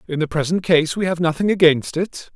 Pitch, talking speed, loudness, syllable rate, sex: 170 Hz, 230 wpm, -18 LUFS, 5.6 syllables/s, male